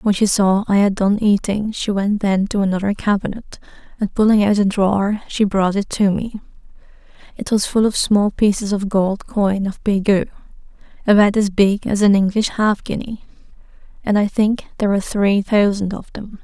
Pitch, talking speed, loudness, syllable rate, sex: 205 Hz, 185 wpm, -17 LUFS, 5.0 syllables/s, female